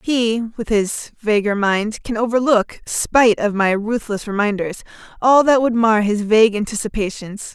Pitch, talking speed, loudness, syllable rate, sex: 220 Hz, 135 wpm, -17 LUFS, 4.5 syllables/s, female